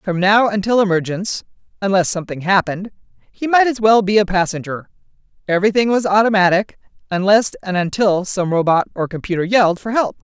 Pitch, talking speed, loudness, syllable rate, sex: 195 Hz, 145 wpm, -16 LUFS, 5.9 syllables/s, female